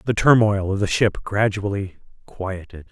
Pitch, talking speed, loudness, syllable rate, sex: 100 Hz, 145 wpm, -20 LUFS, 4.6 syllables/s, male